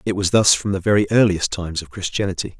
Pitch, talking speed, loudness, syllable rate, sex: 95 Hz, 230 wpm, -19 LUFS, 6.6 syllables/s, male